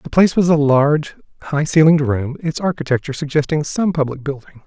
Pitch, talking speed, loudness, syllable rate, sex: 150 Hz, 180 wpm, -17 LUFS, 6.2 syllables/s, male